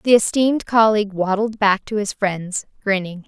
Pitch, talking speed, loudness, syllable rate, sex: 205 Hz, 165 wpm, -19 LUFS, 4.9 syllables/s, female